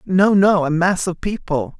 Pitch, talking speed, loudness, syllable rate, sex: 180 Hz, 200 wpm, -17 LUFS, 4.2 syllables/s, male